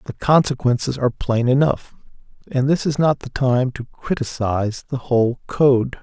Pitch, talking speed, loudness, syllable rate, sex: 130 Hz, 160 wpm, -19 LUFS, 4.8 syllables/s, male